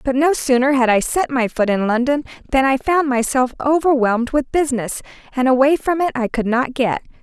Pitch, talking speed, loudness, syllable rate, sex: 260 Hz, 210 wpm, -17 LUFS, 5.5 syllables/s, female